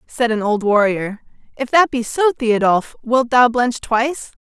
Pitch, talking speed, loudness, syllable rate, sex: 240 Hz, 175 wpm, -17 LUFS, 4.4 syllables/s, female